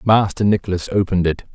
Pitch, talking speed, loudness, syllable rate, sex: 95 Hz, 155 wpm, -18 LUFS, 5.9 syllables/s, male